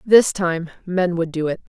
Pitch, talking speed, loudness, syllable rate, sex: 175 Hz, 200 wpm, -20 LUFS, 4.3 syllables/s, female